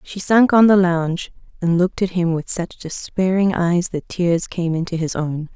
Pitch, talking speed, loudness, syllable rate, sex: 175 Hz, 205 wpm, -19 LUFS, 4.7 syllables/s, female